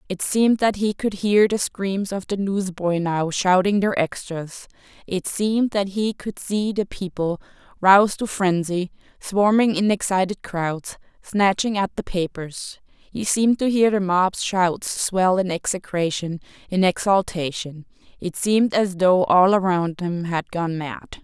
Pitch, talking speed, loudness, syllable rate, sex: 190 Hz, 155 wpm, -21 LUFS, 4.1 syllables/s, female